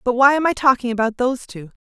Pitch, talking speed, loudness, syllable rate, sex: 250 Hz, 260 wpm, -17 LUFS, 6.8 syllables/s, female